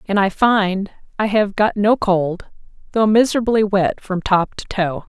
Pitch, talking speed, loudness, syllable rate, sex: 200 Hz, 175 wpm, -18 LUFS, 4.3 syllables/s, female